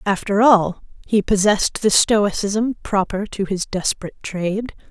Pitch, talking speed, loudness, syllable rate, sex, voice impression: 200 Hz, 135 wpm, -19 LUFS, 4.7 syllables/s, female, very feminine, slightly young, slightly adult-like, very thin, tensed, powerful, bright, hard, clear, very fluent, slightly raspy, cool, intellectual, very refreshing, sincere, slightly calm, friendly, reassuring, very unique, elegant, wild, sweet, lively, strict, intense, sharp